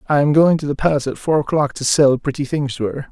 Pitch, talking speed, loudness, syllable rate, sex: 145 Hz, 290 wpm, -17 LUFS, 6.5 syllables/s, male